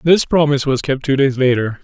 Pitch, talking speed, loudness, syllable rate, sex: 135 Hz, 230 wpm, -15 LUFS, 5.8 syllables/s, male